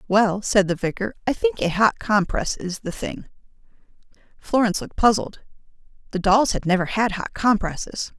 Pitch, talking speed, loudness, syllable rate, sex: 210 Hz, 160 wpm, -22 LUFS, 5.1 syllables/s, female